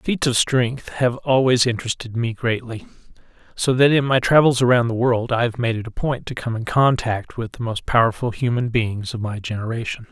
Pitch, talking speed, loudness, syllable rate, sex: 120 Hz, 210 wpm, -20 LUFS, 5.2 syllables/s, male